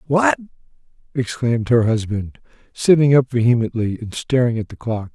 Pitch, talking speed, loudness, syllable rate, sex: 125 Hz, 140 wpm, -19 LUFS, 5.2 syllables/s, male